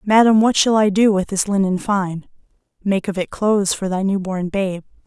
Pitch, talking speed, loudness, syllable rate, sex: 195 Hz, 200 wpm, -18 LUFS, 5.2 syllables/s, female